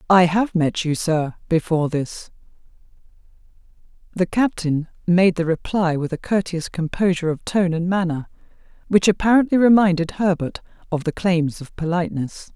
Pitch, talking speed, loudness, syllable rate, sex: 175 Hz, 140 wpm, -20 LUFS, 5.0 syllables/s, female